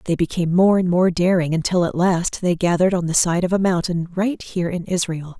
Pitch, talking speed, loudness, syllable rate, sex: 175 Hz, 235 wpm, -19 LUFS, 5.9 syllables/s, female